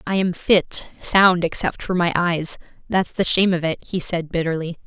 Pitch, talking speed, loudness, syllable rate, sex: 175 Hz, 195 wpm, -19 LUFS, 4.8 syllables/s, female